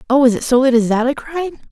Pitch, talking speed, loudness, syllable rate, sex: 265 Hz, 315 wpm, -15 LUFS, 6.7 syllables/s, female